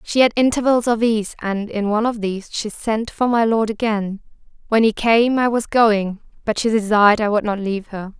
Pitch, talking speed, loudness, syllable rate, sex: 220 Hz, 220 wpm, -18 LUFS, 5.3 syllables/s, female